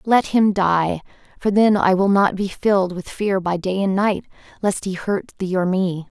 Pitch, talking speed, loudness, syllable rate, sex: 190 Hz, 215 wpm, -19 LUFS, 4.4 syllables/s, female